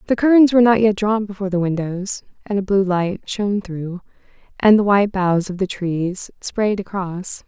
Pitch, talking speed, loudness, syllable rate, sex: 195 Hz, 195 wpm, -18 LUFS, 5.0 syllables/s, female